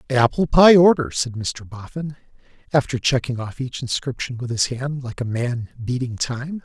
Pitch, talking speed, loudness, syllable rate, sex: 130 Hz, 170 wpm, -20 LUFS, 4.7 syllables/s, male